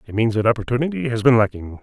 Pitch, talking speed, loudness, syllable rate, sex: 115 Hz, 230 wpm, -19 LUFS, 7.1 syllables/s, male